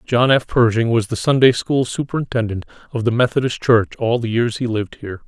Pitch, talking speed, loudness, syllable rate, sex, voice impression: 115 Hz, 205 wpm, -18 LUFS, 5.9 syllables/s, male, masculine, adult-like, thick, tensed, powerful, slightly hard, cool, intellectual, calm, mature, wild, lively, slightly strict